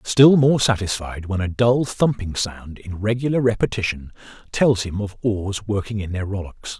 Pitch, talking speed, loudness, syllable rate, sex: 105 Hz, 170 wpm, -20 LUFS, 4.6 syllables/s, male